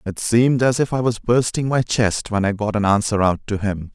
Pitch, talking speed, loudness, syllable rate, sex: 110 Hz, 260 wpm, -19 LUFS, 5.2 syllables/s, male